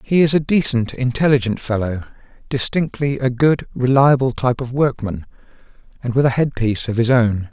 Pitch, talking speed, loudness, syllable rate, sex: 125 Hz, 160 wpm, -18 LUFS, 5.4 syllables/s, male